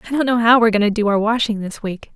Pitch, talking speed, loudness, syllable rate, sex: 220 Hz, 360 wpm, -16 LUFS, 7.6 syllables/s, female